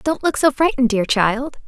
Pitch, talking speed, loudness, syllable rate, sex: 260 Hz, 215 wpm, -18 LUFS, 5.4 syllables/s, female